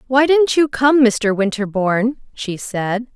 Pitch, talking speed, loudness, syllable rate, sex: 240 Hz, 150 wpm, -16 LUFS, 4.0 syllables/s, female